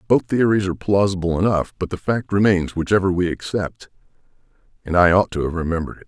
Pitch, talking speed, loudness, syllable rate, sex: 95 Hz, 190 wpm, -19 LUFS, 6.3 syllables/s, male